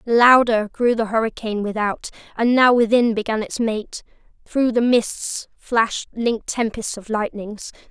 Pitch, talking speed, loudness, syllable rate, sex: 225 Hz, 145 wpm, -19 LUFS, 4.5 syllables/s, female